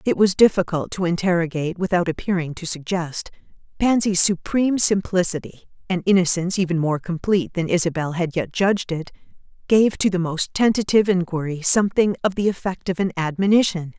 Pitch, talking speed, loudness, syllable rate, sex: 180 Hz, 155 wpm, -20 LUFS, 5.8 syllables/s, female